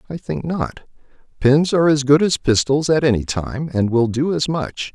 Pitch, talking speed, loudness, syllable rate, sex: 140 Hz, 205 wpm, -18 LUFS, 4.8 syllables/s, male